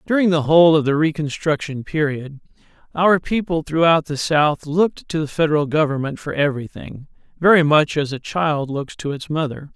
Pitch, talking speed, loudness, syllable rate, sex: 155 Hz, 170 wpm, -19 LUFS, 5.2 syllables/s, male